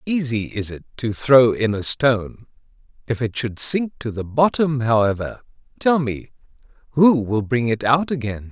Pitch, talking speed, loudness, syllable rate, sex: 125 Hz, 170 wpm, -20 LUFS, 4.5 syllables/s, male